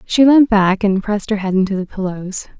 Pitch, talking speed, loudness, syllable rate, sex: 205 Hz, 230 wpm, -15 LUFS, 5.5 syllables/s, female